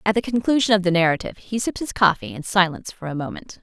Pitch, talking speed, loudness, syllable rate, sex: 195 Hz, 250 wpm, -21 LUFS, 7.1 syllables/s, female